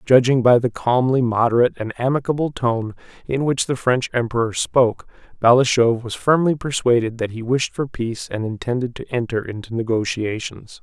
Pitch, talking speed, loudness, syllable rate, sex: 120 Hz, 160 wpm, -19 LUFS, 5.3 syllables/s, male